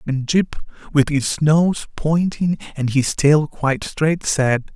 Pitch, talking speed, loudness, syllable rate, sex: 150 Hz, 150 wpm, -19 LUFS, 3.5 syllables/s, male